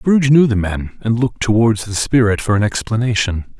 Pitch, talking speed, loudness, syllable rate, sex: 110 Hz, 200 wpm, -16 LUFS, 5.5 syllables/s, male